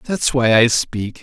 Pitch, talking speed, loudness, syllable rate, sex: 120 Hz, 195 wpm, -16 LUFS, 3.7 syllables/s, male